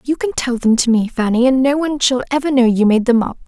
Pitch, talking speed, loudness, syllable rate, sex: 250 Hz, 295 wpm, -15 LUFS, 6.3 syllables/s, female